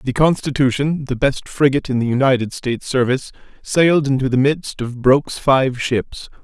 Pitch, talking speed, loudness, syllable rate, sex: 135 Hz, 170 wpm, -17 LUFS, 5.2 syllables/s, male